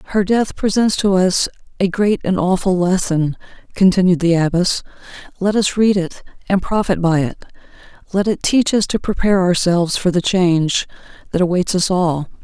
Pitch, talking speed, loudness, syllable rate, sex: 185 Hz, 170 wpm, -16 LUFS, 5.1 syllables/s, female